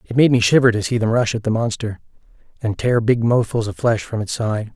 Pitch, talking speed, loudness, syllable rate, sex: 115 Hz, 250 wpm, -18 LUFS, 5.7 syllables/s, male